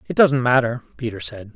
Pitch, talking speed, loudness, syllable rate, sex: 125 Hz, 195 wpm, -20 LUFS, 5.4 syllables/s, male